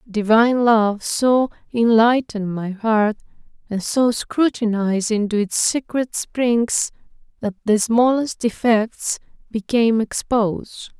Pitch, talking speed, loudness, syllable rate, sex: 225 Hz, 105 wpm, -19 LUFS, 3.9 syllables/s, female